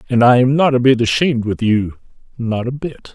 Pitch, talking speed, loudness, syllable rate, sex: 120 Hz, 230 wpm, -15 LUFS, 5.5 syllables/s, male